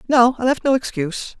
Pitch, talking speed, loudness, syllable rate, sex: 245 Hz, 215 wpm, -18 LUFS, 5.9 syllables/s, female